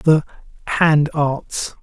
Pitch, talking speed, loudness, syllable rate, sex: 150 Hz, 100 wpm, -18 LUFS, 2.6 syllables/s, male